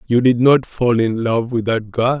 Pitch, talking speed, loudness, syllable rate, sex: 120 Hz, 245 wpm, -16 LUFS, 4.4 syllables/s, male